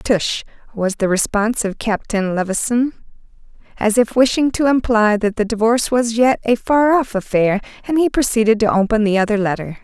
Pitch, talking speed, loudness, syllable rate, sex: 225 Hz, 175 wpm, -17 LUFS, 5.3 syllables/s, female